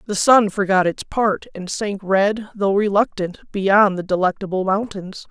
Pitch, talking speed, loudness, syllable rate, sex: 200 Hz, 160 wpm, -19 LUFS, 4.2 syllables/s, female